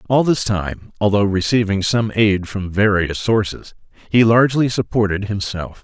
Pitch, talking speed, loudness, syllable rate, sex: 105 Hz, 145 wpm, -17 LUFS, 4.6 syllables/s, male